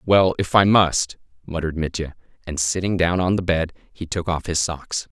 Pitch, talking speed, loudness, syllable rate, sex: 85 Hz, 195 wpm, -21 LUFS, 4.9 syllables/s, male